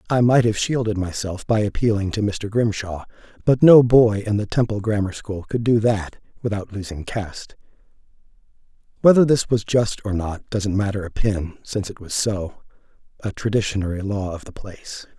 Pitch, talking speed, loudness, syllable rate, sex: 105 Hz, 170 wpm, -21 LUFS, 5.1 syllables/s, male